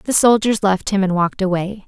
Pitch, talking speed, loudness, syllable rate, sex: 200 Hz, 225 wpm, -17 LUFS, 5.5 syllables/s, female